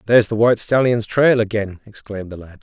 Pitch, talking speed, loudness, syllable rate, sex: 110 Hz, 205 wpm, -16 LUFS, 6.2 syllables/s, male